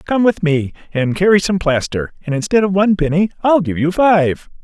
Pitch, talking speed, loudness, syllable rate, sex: 175 Hz, 205 wpm, -15 LUFS, 5.3 syllables/s, male